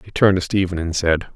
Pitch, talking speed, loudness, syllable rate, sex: 90 Hz, 265 wpm, -19 LUFS, 6.7 syllables/s, male